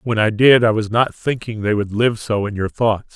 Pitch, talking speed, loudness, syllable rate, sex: 110 Hz, 265 wpm, -17 LUFS, 5.1 syllables/s, male